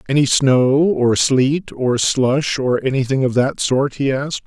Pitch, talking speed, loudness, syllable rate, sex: 135 Hz, 175 wpm, -16 LUFS, 4.0 syllables/s, male